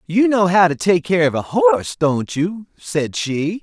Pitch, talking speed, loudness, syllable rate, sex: 175 Hz, 215 wpm, -17 LUFS, 4.2 syllables/s, male